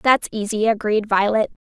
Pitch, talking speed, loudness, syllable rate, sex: 215 Hz, 140 wpm, -20 LUFS, 5.0 syllables/s, female